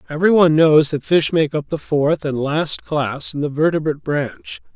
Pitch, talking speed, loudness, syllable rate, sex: 150 Hz, 190 wpm, -17 LUFS, 4.8 syllables/s, male